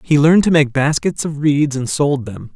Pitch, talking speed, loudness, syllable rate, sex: 145 Hz, 235 wpm, -15 LUFS, 4.9 syllables/s, male